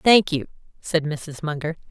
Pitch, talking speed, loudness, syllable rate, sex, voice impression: 160 Hz, 160 wpm, -23 LUFS, 4.4 syllables/s, female, very feminine, slightly young, slightly adult-like, very thin, tensed, slightly powerful, bright, slightly soft, clear, fluent, slightly raspy, cute, very intellectual, very refreshing, sincere, calm, slightly friendly, slightly reassuring, very unique, elegant, slightly wild, very sweet, slightly lively, slightly strict, slightly intense, sharp, light